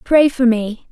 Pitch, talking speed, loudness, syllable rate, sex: 245 Hz, 195 wpm, -15 LUFS, 4.0 syllables/s, female